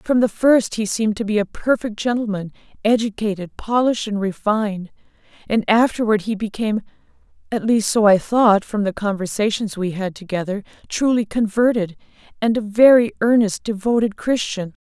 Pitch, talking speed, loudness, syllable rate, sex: 215 Hz, 140 wpm, -19 LUFS, 5.3 syllables/s, female